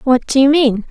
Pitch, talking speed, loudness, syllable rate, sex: 260 Hz, 265 wpm, -12 LUFS, 5.1 syllables/s, female